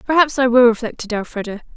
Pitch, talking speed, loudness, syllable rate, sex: 240 Hz, 170 wpm, -17 LUFS, 6.5 syllables/s, female